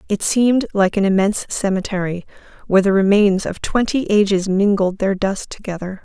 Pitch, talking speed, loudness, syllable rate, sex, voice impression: 200 Hz, 160 wpm, -17 LUFS, 5.4 syllables/s, female, feminine, adult-like, slightly sincere, friendly